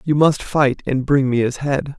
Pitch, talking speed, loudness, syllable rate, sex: 135 Hz, 240 wpm, -18 LUFS, 4.4 syllables/s, male